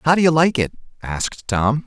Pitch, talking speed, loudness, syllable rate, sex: 135 Hz, 225 wpm, -19 LUFS, 5.6 syllables/s, male